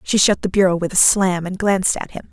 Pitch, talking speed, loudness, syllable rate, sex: 190 Hz, 285 wpm, -17 LUFS, 5.9 syllables/s, female